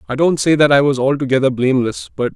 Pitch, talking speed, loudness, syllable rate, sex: 135 Hz, 230 wpm, -15 LUFS, 6.7 syllables/s, male